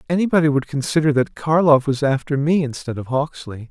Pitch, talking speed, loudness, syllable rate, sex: 145 Hz, 180 wpm, -19 LUFS, 5.7 syllables/s, male